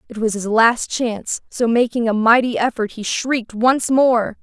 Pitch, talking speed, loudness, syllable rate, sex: 230 Hz, 190 wpm, -17 LUFS, 4.6 syllables/s, female